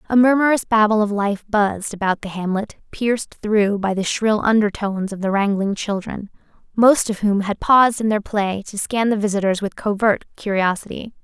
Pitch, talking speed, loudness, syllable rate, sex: 210 Hz, 180 wpm, -19 LUFS, 5.2 syllables/s, female